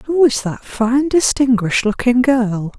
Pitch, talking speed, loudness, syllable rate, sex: 245 Hz, 150 wpm, -15 LUFS, 4.1 syllables/s, female